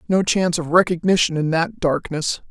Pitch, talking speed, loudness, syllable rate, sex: 170 Hz, 170 wpm, -19 LUFS, 5.2 syllables/s, female